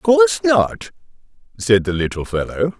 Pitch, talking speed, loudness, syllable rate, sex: 130 Hz, 130 wpm, -17 LUFS, 4.4 syllables/s, male